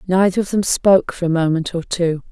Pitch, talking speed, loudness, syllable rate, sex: 175 Hz, 235 wpm, -17 LUFS, 5.7 syllables/s, female